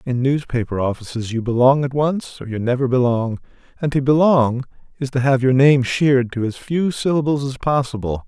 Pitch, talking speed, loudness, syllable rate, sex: 130 Hz, 190 wpm, -18 LUFS, 5.3 syllables/s, male